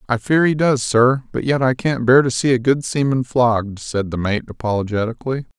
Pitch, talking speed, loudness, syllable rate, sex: 125 Hz, 215 wpm, -18 LUFS, 5.4 syllables/s, male